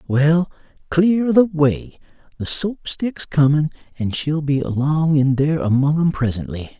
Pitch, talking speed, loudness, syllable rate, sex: 150 Hz, 150 wpm, -19 LUFS, 4.2 syllables/s, male